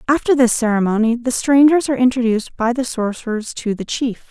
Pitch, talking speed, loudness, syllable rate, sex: 240 Hz, 180 wpm, -17 LUFS, 5.8 syllables/s, female